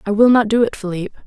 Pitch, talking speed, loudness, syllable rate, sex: 215 Hz, 285 wpm, -16 LUFS, 6.8 syllables/s, female